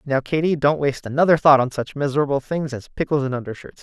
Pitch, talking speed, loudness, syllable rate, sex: 140 Hz, 220 wpm, -20 LUFS, 6.4 syllables/s, male